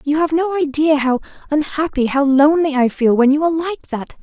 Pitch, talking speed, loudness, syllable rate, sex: 295 Hz, 215 wpm, -16 LUFS, 5.8 syllables/s, female